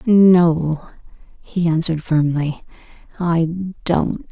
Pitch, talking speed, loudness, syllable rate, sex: 170 Hz, 85 wpm, -18 LUFS, 2.8 syllables/s, female